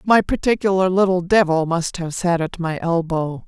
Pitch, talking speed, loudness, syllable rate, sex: 175 Hz, 175 wpm, -19 LUFS, 4.8 syllables/s, female